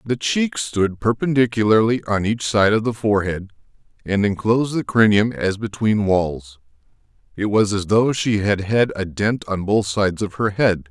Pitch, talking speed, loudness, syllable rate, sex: 105 Hz, 175 wpm, -19 LUFS, 4.7 syllables/s, male